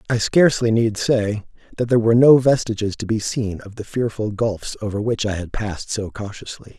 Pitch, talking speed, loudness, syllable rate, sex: 110 Hz, 205 wpm, -20 LUFS, 5.5 syllables/s, male